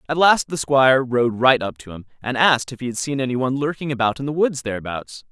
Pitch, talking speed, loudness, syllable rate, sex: 130 Hz, 260 wpm, -19 LUFS, 6.3 syllables/s, male